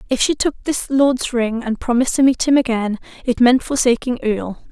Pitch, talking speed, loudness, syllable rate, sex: 245 Hz, 205 wpm, -17 LUFS, 5.5 syllables/s, female